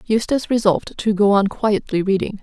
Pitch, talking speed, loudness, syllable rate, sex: 205 Hz, 175 wpm, -18 LUFS, 5.7 syllables/s, female